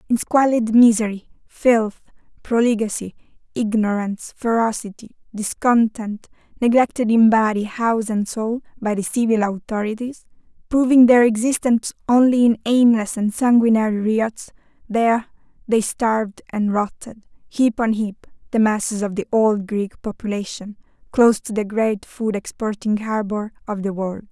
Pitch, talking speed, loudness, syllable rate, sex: 220 Hz, 130 wpm, -19 LUFS, 4.7 syllables/s, female